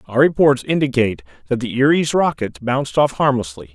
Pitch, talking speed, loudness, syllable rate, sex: 130 Hz, 160 wpm, -17 LUFS, 5.6 syllables/s, male